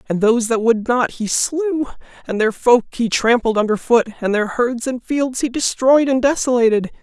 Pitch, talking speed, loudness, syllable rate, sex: 235 Hz, 190 wpm, -17 LUFS, 4.9 syllables/s, male